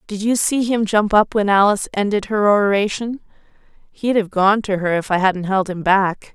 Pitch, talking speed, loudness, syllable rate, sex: 205 Hz, 210 wpm, -17 LUFS, 4.9 syllables/s, female